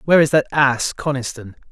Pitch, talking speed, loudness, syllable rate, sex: 135 Hz, 175 wpm, -17 LUFS, 5.8 syllables/s, male